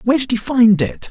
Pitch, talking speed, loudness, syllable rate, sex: 230 Hz, 270 wpm, -15 LUFS, 5.6 syllables/s, male